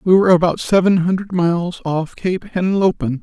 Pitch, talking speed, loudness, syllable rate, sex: 175 Hz, 165 wpm, -17 LUFS, 5.1 syllables/s, male